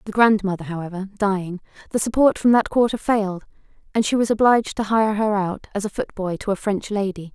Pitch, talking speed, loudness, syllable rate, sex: 205 Hz, 205 wpm, -21 LUFS, 5.9 syllables/s, female